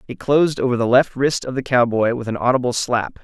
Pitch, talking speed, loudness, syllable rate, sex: 125 Hz, 240 wpm, -18 LUFS, 5.9 syllables/s, male